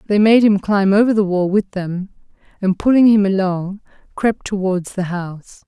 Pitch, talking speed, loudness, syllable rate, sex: 195 Hz, 180 wpm, -16 LUFS, 4.7 syllables/s, female